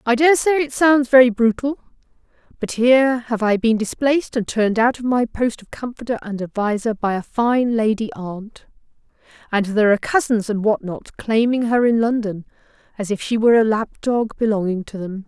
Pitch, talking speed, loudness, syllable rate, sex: 230 Hz, 190 wpm, -18 LUFS, 5.3 syllables/s, female